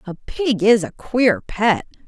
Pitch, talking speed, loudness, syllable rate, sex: 210 Hz, 175 wpm, -18 LUFS, 3.7 syllables/s, female